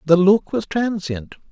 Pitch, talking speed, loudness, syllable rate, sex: 185 Hz, 160 wpm, -19 LUFS, 3.9 syllables/s, male